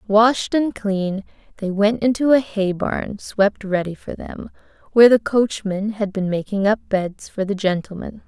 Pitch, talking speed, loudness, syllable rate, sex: 205 Hz, 175 wpm, -19 LUFS, 4.2 syllables/s, female